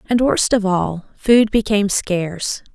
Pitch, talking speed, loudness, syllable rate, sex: 205 Hz, 155 wpm, -17 LUFS, 4.3 syllables/s, female